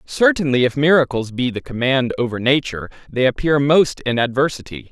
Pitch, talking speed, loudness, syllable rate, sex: 135 Hz, 160 wpm, -17 LUFS, 5.5 syllables/s, male